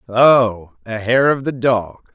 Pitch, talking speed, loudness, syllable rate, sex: 120 Hz, 170 wpm, -16 LUFS, 3.3 syllables/s, male